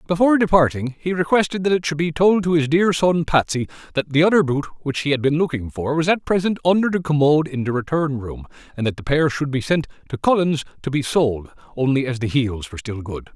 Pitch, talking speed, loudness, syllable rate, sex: 150 Hz, 240 wpm, -20 LUFS, 6.1 syllables/s, male